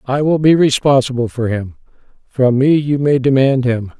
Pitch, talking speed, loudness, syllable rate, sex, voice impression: 135 Hz, 180 wpm, -14 LUFS, 4.8 syllables/s, male, masculine, middle-aged, slightly relaxed, powerful, slightly dark, slightly muffled, slightly raspy, calm, mature, wild, slightly lively, strict